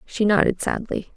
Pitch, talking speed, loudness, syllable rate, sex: 205 Hz, 155 wpm, -22 LUFS, 4.9 syllables/s, female